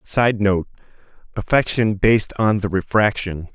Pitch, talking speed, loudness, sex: 105 Hz, 100 wpm, -19 LUFS, male